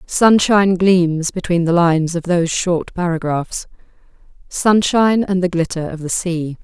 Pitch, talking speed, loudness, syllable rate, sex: 175 Hz, 135 wpm, -16 LUFS, 4.6 syllables/s, female